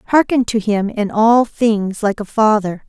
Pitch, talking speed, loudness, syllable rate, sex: 215 Hz, 190 wpm, -16 LUFS, 4.2 syllables/s, female